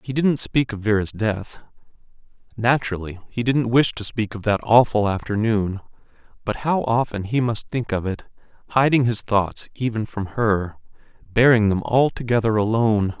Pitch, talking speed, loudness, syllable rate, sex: 110 Hz, 155 wpm, -21 LUFS, 4.8 syllables/s, male